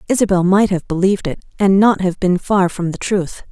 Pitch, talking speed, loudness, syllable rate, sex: 190 Hz, 220 wpm, -16 LUFS, 5.5 syllables/s, female